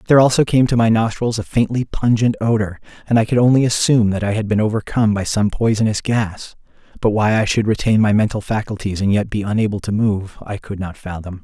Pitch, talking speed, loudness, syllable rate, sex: 110 Hz, 220 wpm, -17 LUFS, 6.0 syllables/s, male